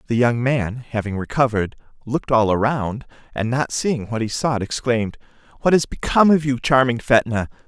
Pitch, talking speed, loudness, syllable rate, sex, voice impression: 120 Hz, 170 wpm, -20 LUFS, 5.4 syllables/s, male, masculine, adult-like, slightly thick, slightly cool, refreshing, slightly friendly